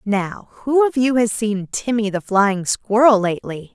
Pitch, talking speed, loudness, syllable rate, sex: 215 Hz, 175 wpm, -18 LUFS, 4.3 syllables/s, female